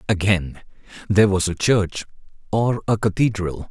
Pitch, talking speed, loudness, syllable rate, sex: 100 Hz, 130 wpm, -20 LUFS, 4.6 syllables/s, male